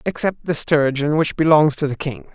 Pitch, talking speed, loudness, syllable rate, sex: 150 Hz, 205 wpm, -18 LUFS, 5.1 syllables/s, male